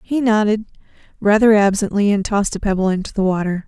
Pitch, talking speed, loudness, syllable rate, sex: 205 Hz, 180 wpm, -17 LUFS, 6.3 syllables/s, female